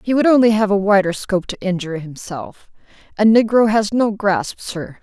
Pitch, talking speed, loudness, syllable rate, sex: 200 Hz, 190 wpm, -17 LUFS, 5.2 syllables/s, female